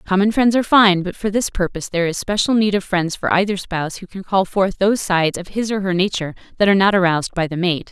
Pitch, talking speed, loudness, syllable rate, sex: 190 Hz, 265 wpm, -18 LUFS, 6.6 syllables/s, female